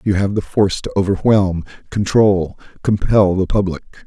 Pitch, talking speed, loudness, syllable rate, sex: 95 Hz, 150 wpm, -17 LUFS, 5.0 syllables/s, male